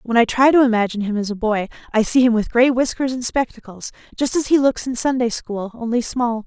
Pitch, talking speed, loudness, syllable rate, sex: 240 Hz, 240 wpm, -18 LUFS, 5.8 syllables/s, female